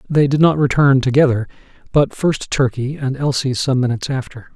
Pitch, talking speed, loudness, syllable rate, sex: 135 Hz, 170 wpm, -17 LUFS, 5.4 syllables/s, male